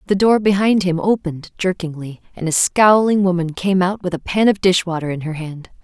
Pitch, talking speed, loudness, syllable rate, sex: 185 Hz, 205 wpm, -17 LUFS, 5.4 syllables/s, female